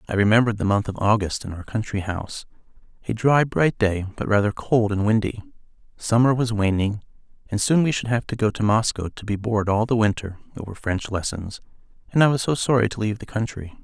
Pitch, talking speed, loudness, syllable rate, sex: 110 Hz, 215 wpm, -22 LUFS, 6.0 syllables/s, male